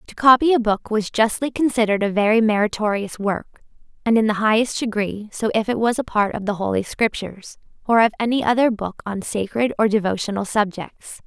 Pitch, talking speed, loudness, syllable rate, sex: 220 Hz, 190 wpm, -20 LUFS, 5.7 syllables/s, female